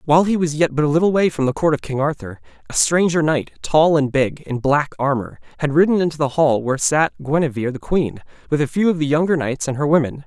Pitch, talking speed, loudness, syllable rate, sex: 150 Hz, 250 wpm, -18 LUFS, 6.2 syllables/s, male